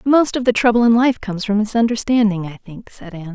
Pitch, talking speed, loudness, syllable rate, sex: 220 Hz, 235 wpm, -16 LUFS, 6.2 syllables/s, female